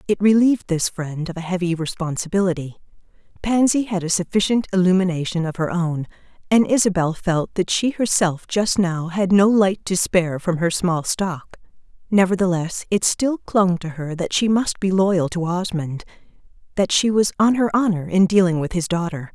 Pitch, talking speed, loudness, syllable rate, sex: 185 Hz, 175 wpm, -20 LUFS, 5.0 syllables/s, female